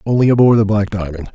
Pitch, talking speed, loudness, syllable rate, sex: 105 Hz, 225 wpm, -14 LUFS, 6.6 syllables/s, male